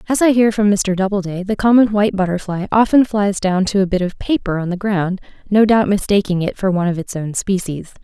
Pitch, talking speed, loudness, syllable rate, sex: 195 Hz, 230 wpm, -16 LUFS, 5.8 syllables/s, female